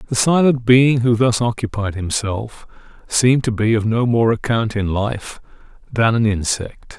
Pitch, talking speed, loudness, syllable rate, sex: 115 Hz, 165 wpm, -17 LUFS, 4.3 syllables/s, male